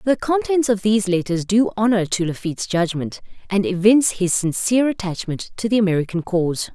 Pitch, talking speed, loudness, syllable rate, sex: 200 Hz, 170 wpm, -19 LUFS, 5.8 syllables/s, female